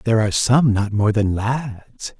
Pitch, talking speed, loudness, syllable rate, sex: 110 Hz, 190 wpm, -18 LUFS, 4.2 syllables/s, male